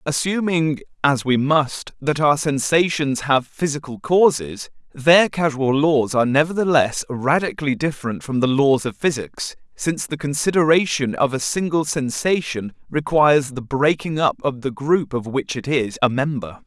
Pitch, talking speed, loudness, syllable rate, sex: 145 Hz, 150 wpm, -19 LUFS, 4.6 syllables/s, male